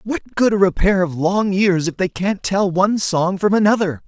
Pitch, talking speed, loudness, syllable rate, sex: 190 Hz, 235 wpm, -17 LUFS, 5.3 syllables/s, male